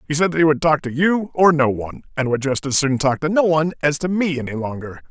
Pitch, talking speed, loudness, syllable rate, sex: 150 Hz, 295 wpm, -19 LUFS, 6.3 syllables/s, male